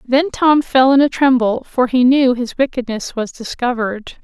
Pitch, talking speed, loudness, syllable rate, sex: 255 Hz, 185 wpm, -15 LUFS, 4.7 syllables/s, female